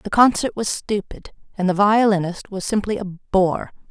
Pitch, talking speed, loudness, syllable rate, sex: 200 Hz, 170 wpm, -20 LUFS, 4.6 syllables/s, female